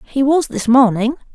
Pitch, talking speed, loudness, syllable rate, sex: 255 Hz, 180 wpm, -15 LUFS, 4.9 syllables/s, female